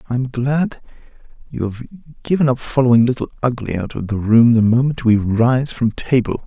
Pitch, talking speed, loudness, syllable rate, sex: 125 Hz, 185 wpm, -17 LUFS, 5.0 syllables/s, male